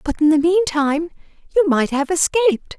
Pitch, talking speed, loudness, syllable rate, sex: 325 Hz, 170 wpm, -17 LUFS, 5.4 syllables/s, female